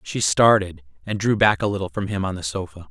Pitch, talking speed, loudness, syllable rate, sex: 95 Hz, 250 wpm, -21 LUFS, 5.8 syllables/s, male